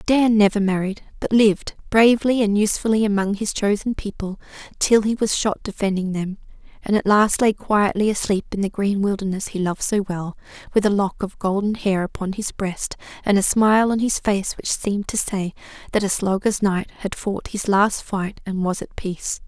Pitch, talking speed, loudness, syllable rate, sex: 205 Hz, 195 wpm, -21 LUFS, 5.2 syllables/s, female